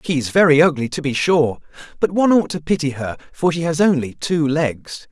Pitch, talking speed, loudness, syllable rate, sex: 150 Hz, 225 wpm, -18 LUFS, 5.4 syllables/s, male